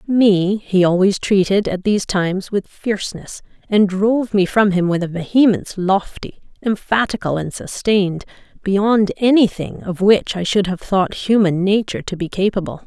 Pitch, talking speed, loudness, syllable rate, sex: 195 Hz, 165 wpm, -17 LUFS, 4.8 syllables/s, female